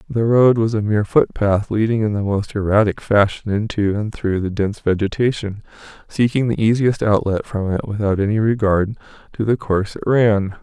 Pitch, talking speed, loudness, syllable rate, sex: 105 Hz, 180 wpm, -18 LUFS, 5.3 syllables/s, male